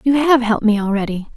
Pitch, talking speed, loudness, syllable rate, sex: 230 Hz, 220 wpm, -16 LUFS, 6.6 syllables/s, female